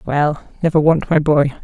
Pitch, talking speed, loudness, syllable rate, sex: 150 Hz, 185 wpm, -16 LUFS, 4.8 syllables/s, female